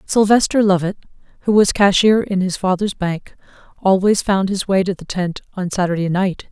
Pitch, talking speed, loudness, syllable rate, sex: 190 Hz, 175 wpm, -17 LUFS, 5.0 syllables/s, female